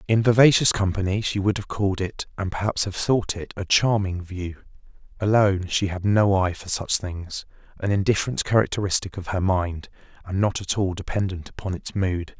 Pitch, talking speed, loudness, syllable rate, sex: 95 Hz, 180 wpm, -23 LUFS, 5.4 syllables/s, male